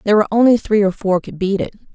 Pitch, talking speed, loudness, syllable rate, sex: 205 Hz, 275 wpm, -16 LUFS, 7.6 syllables/s, female